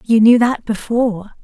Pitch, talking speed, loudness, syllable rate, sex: 225 Hz, 165 wpm, -15 LUFS, 4.9 syllables/s, female